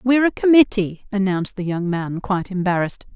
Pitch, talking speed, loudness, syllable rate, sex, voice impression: 200 Hz, 170 wpm, -19 LUFS, 6.1 syllables/s, female, feminine, middle-aged, tensed, powerful, clear, intellectual, elegant, lively, strict, slightly intense, sharp